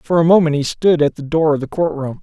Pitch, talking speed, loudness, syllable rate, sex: 155 Hz, 325 wpm, -16 LUFS, 5.9 syllables/s, male